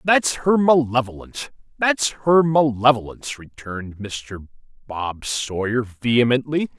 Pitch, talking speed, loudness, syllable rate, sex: 125 Hz, 90 wpm, -20 LUFS, 4.2 syllables/s, male